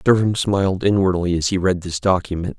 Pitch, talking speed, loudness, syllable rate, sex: 95 Hz, 185 wpm, -19 LUFS, 5.6 syllables/s, male